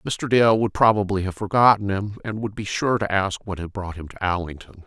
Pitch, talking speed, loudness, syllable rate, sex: 100 Hz, 235 wpm, -22 LUFS, 5.4 syllables/s, male